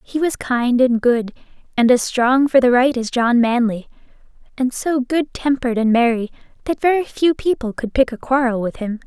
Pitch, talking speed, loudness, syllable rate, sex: 250 Hz, 200 wpm, -18 LUFS, 5.0 syllables/s, female